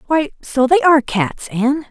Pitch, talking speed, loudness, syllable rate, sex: 275 Hz, 190 wpm, -16 LUFS, 4.6 syllables/s, female